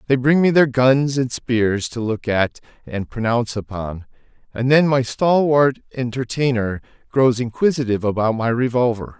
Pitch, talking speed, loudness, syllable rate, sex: 125 Hz, 150 wpm, -19 LUFS, 4.7 syllables/s, male